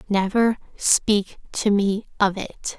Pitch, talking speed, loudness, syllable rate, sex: 205 Hz, 130 wpm, -22 LUFS, 3.2 syllables/s, female